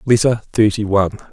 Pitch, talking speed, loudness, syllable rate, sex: 110 Hz, 135 wpm, -16 LUFS, 6.0 syllables/s, male